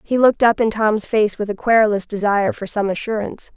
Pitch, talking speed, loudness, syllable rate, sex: 215 Hz, 220 wpm, -18 LUFS, 6.1 syllables/s, female